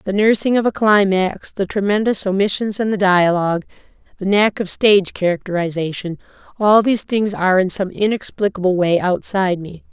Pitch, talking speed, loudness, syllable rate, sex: 195 Hz, 150 wpm, -17 LUFS, 5.4 syllables/s, female